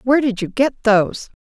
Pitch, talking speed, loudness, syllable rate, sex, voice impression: 235 Hz, 210 wpm, -17 LUFS, 5.9 syllables/s, female, very feminine, adult-like, slightly muffled, elegant, slightly sweet